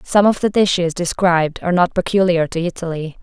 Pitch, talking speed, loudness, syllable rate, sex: 175 Hz, 185 wpm, -17 LUFS, 5.8 syllables/s, female